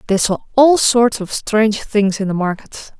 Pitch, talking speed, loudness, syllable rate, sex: 215 Hz, 200 wpm, -15 LUFS, 4.6 syllables/s, female